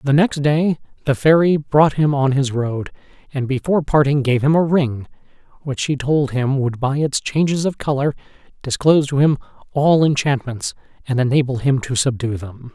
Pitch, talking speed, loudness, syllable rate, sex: 140 Hz, 180 wpm, -18 LUFS, 5.0 syllables/s, male